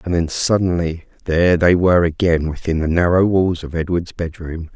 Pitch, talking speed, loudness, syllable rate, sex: 85 Hz, 175 wpm, -17 LUFS, 5.2 syllables/s, male